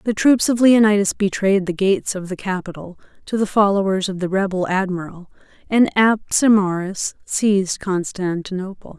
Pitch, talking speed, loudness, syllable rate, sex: 195 Hz, 140 wpm, -18 LUFS, 4.8 syllables/s, female